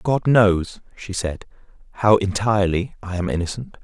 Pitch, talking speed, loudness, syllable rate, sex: 100 Hz, 140 wpm, -20 LUFS, 4.8 syllables/s, male